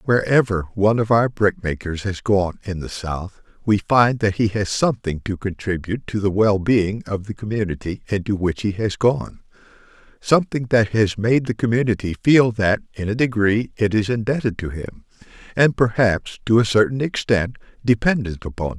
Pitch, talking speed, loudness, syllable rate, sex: 105 Hz, 175 wpm, -20 LUFS, 5.1 syllables/s, male